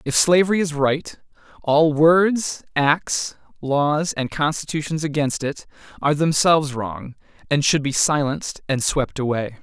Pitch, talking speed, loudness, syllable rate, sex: 150 Hz, 135 wpm, -20 LUFS, 4.3 syllables/s, male